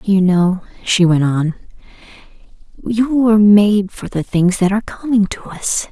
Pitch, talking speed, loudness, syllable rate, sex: 200 Hz, 160 wpm, -15 LUFS, 4.4 syllables/s, female